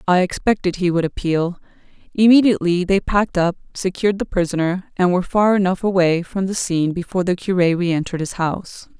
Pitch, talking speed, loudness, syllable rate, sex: 180 Hz, 175 wpm, -18 LUFS, 6.0 syllables/s, female